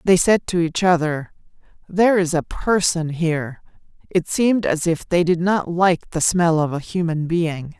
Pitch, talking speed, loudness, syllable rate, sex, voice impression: 170 Hz, 185 wpm, -19 LUFS, 4.6 syllables/s, female, very feminine, slightly middle-aged, slightly thin, tensed, slightly powerful, slightly dark, slightly soft, clear, slightly fluent, slightly raspy, slightly cool, intellectual, slightly refreshing, sincere, calm, slightly friendly, reassuring, unique, slightly elegant, slightly wild, sweet, lively, strict, slightly intense, slightly sharp, modest